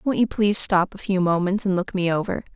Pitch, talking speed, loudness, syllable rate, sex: 190 Hz, 260 wpm, -21 LUFS, 5.9 syllables/s, female